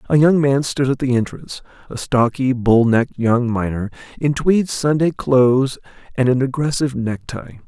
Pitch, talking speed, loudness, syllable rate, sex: 130 Hz, 170 wpm, -17 LUFS, 5.0 syllables/s, male